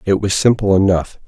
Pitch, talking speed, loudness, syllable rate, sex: 100 Hz, 190 wpm, -15 LUFS, 5.3 syllables/s, male